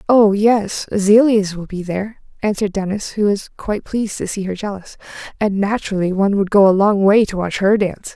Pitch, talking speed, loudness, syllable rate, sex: 200 Hz, 205 wpm, -17 LUFS, 5.8 syllables/s, female